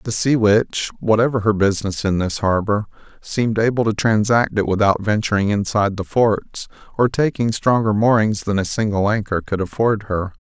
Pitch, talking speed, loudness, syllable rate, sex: 105 Hz, 170 wpm, -18 LUFS, 5.2 syllables/s, male